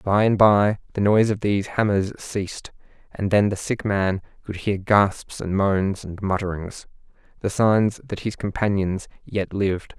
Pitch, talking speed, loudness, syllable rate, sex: 100 Hz, 160 wpm, -22 LUFS, 4.5 syllables/s, male